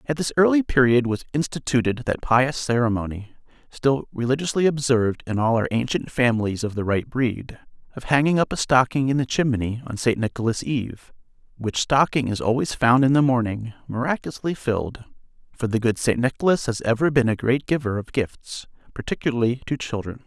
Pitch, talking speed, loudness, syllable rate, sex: 125 Hz, 175 wpm, -22 LUFS, 5.5 syllables/s, male